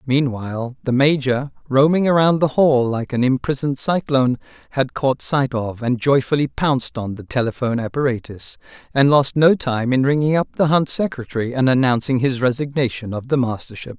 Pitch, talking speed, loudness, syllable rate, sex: 130 Hz, 165 wpm, -19 LUFS, 5.3 syllables/s, male